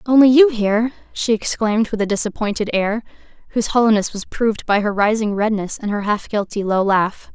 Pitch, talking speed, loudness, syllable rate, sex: 215 Hz, 190 wpm, -18 LUFS, 5.7 syllables/s, female